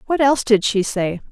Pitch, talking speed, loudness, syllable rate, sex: 230 Hz, 230 wpm, -18 LUFS, 5.6 syllables/s, female